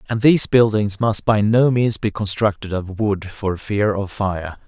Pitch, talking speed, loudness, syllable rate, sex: 105 Hz, 190 wpm, -19 LUFS, 4.3 syllables/s, male